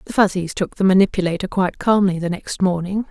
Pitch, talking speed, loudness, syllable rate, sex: 185 Hz, 195 wpm, -19 LUFS, 6.1 syllables/s, female